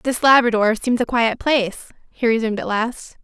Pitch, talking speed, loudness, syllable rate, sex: 230 Hz, 185 wpm, -18 LUFS, 5.3 syllables/s, female